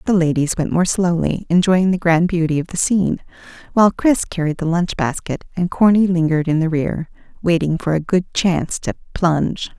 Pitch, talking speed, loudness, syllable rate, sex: 170 Hz, 190 wpm, -18 LUFS, 5.4 syllables/s, female